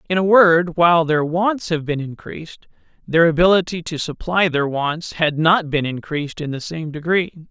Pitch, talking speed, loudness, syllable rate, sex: 165 Hz, 185 wpm, -18 LUFS, 4.8 syllables/s, male